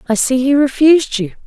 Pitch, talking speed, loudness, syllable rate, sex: 265 Hz, 205 wpm, -13 LUFS, 6.0 syllables/s, female